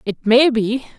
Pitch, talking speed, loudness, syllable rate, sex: 235 Hz, 185 wpm, -16 LUFS, 4.0 syllables/s, female